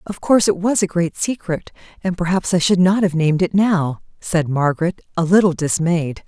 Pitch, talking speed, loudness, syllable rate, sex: 175 Hz, 200 wpm, -18 LUFS, 5.2 syllables/s, female